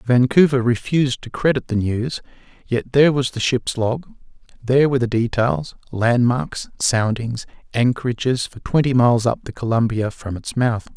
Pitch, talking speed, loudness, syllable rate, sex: 125 Hz, 150 wpm, -19 LUFS, 5.0 syllables/s, male